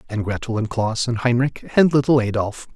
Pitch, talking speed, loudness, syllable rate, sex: 120 Hz, 195 wpm, -20 LUFS, 5.4 syllables/s, male